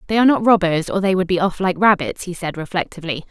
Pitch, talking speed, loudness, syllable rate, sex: 185 Hz, 255 wpm, -18 LUFS, 6.9 syllables/s, female